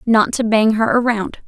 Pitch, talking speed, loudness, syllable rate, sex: 225 Hz, 205 wpm, -16 LUFS, 3.7 syllables/s, female